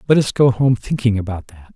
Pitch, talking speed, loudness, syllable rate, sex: 115 Hz, 240 wpm, -17 LUFS, 5.7 syllables/s, male